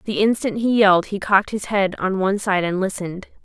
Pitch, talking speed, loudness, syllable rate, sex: 200 Hz, 225 wpm, -19 LUFS, 6.0 syllables/s, female